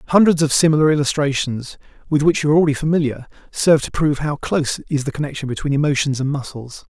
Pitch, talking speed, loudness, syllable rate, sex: 145 Hz, 190 wpm, -18 LUFS, 7.0 syllables/s, male